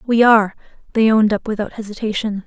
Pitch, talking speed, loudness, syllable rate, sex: 215 Hz, 170 wpm, -17 LUFS, 6.6 syllables/s, female